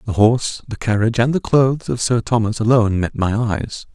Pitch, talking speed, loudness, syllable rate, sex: 115 Hz, 215 wpm, -18 LUFS, 5.7 syllables/s, male